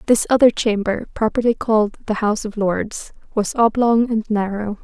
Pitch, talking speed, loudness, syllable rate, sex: 220 Hz, 160 wpm, -19 LUFS, 4.9 syllables/s, female